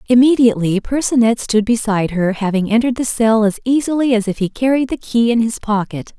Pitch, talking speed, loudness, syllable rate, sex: 225 Hz, 195 wpm, -16 LUFS, 5.9 syllables/s, female